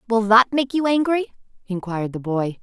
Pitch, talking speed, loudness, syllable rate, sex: 225 Hz, 185 wpm, -20 LUFS, 5.2 syllables/s, female